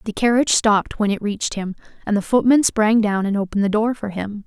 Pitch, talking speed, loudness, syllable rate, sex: 210 Hz, 240 wpm, -19 LUFS, 6.2 syllables/s, female